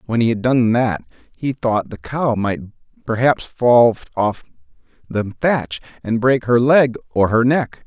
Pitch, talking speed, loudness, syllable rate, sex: 120 Hz, 170 wpm, -17 LUFS, 3.7 syllables/s, male